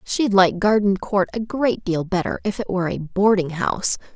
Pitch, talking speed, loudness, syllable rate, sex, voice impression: 195 Hz, 190 wpm, -20 LUFS, 5.0 syllables/s, female, very feminine, slightly adult-like, slightly fluent, slightly refreshing, slightly calm, friendly, kind